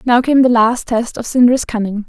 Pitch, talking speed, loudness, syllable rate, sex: 240 Hz, 230 wpm, -14 LUFS, 5.1 syllables/s, female